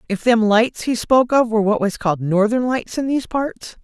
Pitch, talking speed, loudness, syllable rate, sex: 230 Hz, 235 wpm, -18 LUFS, 5.5 syllables/s, female